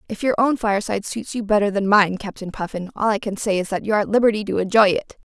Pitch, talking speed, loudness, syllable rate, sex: 205 Hz, 260 wpm, -20 LUFS, 6.7 syllables/s, female